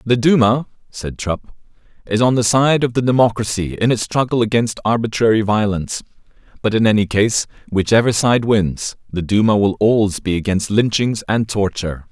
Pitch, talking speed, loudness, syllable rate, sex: 110 Hz, 165 wpm, -17 LUFS, 5.3 syllables/s, male